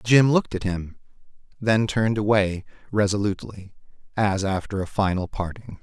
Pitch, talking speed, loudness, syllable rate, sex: 100 Hz, 135 wpm, -23 LUFS, 5.1 syllables/s, male